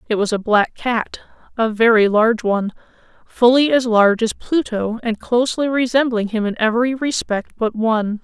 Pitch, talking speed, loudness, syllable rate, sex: 230 Hz, 155 wpm, -17 LUFS, 5.2 syllables/s, female